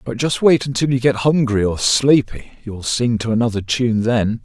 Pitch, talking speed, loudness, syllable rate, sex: 120 Hz, 205 wpm, -17 LUFS, 4.8 syllables/s, male